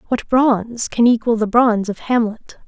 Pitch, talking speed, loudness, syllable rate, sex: 230 Hz, 180 wpm, -17 LUFS, 5.0 syllables/s, female